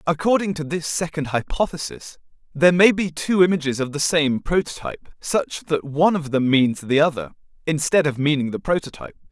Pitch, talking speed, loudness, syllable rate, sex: 155 Hz, 175 wpm, -20 LUFS, 5.6 syllables/s, male